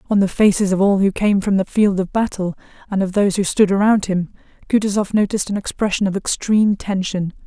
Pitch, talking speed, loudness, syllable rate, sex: 200 Hz, 210 wpm, -18 LUFS, 6.0 syllables/s, female